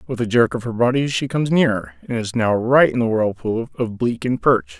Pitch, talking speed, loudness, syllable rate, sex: 115 Hz, 250 wpm, -19 LUFS, 5.4 syllables/s, male